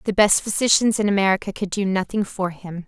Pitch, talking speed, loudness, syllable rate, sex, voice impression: 195 Hz, 210 wpm, -20 LUFS, 5.9 syllables/s, female, feminine, adult-like, tensed, powerful, hard, clear, fluent, intellectual, friendly, slightly wild, lively, intense, sharp